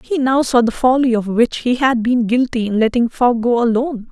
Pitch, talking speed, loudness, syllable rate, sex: 240 Hz, 235 wpm, -16 LUFS, 5.2 syllables/s, female